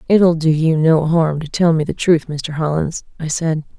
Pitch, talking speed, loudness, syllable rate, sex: 160 Hz, 220 wpm, -17 LUFS, 4.5 syllables/s, female